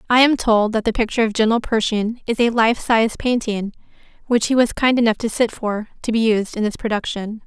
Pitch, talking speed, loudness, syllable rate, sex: 225 Hz, 225 wpm, -19 LUFS, 5.8 syllables/s, female